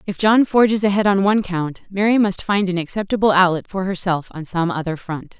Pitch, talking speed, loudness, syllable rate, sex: 190 Hz, 210 wpm, -18 LUFS, 5.7 syllables/s, female